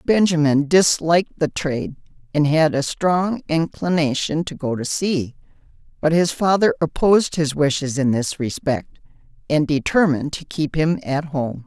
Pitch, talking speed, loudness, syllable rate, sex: 155 Hz, 150 wpm, -19 LUFS, 4.6 syllables/s, female